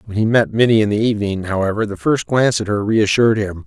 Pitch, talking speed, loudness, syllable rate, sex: 110 Hz, 245 wpm, -16 LUFS, 6.5 syllables/s, male